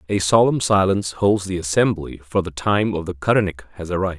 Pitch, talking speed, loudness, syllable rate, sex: 95 Hz, 200 wpm, -20 LUFS, 6.4 syllables/s, male